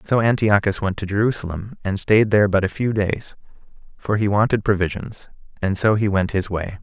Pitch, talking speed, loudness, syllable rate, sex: 105 Hz, 195 wpm, -20 LUFS, 5.4 syllables/s, male